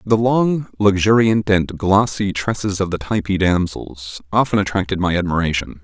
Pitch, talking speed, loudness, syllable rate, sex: 100 Hz, 145 wpm, -18 LUFS, 4.7 syllables/s, male